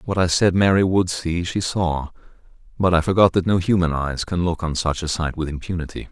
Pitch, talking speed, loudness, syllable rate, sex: 85 Hz, 225 wpm, -20 LUFS, 5.4 syllables/s, male